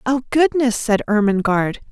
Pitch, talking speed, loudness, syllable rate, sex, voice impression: 230 Hz, 125 wpm, -18 LUFS, 5.1 syllables/s, female, very feminine, very adult-like, slightly thin, slightly tensed, powerful, bright, slightly soft, clear, fluent, cute, slightly cool, intellectual, refreshing, sincere, calm, very friendly, slightly reassuring, slightly unique, elegant, slightly wild, sweet, slightly lively, kind, slightly modest, slightly light